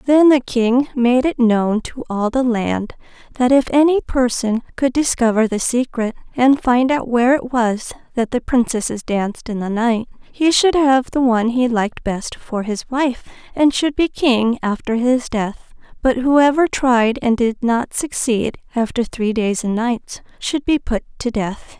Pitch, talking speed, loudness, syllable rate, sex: 245 Hz, 180 wpm, -17 LUFS, 4.2 syllables/s, female